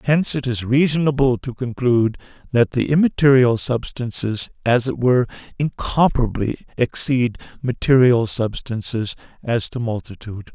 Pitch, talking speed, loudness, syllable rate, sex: 125 Hz, 115 wpm, -19 LUFS, 5.0 syllables/s, male